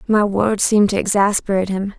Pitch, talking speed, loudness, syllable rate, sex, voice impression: 200 Hz, 180 wpm, -17 LUFS, 6.0 syllables/s, female, very feminine, young, very thin, tensed, slightly weak, very bright, soft, very clear, very fluent, cute, intellectual, very refreshing, sincere, slightly calm, friendly, reassuring, unique, slightly elegant, wild, slightly sweet, lively, kind, slightly intense, slightly sharp, light